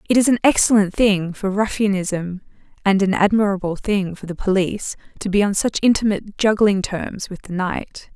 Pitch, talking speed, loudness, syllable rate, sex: 200 Hz, 175 wpm, -19 LUFS, 5.2 syllables/s, female